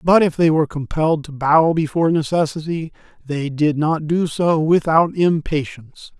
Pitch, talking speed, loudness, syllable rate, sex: 155 Hz, 155 wpm, -18 LUFS, 4.9 syllables/s, male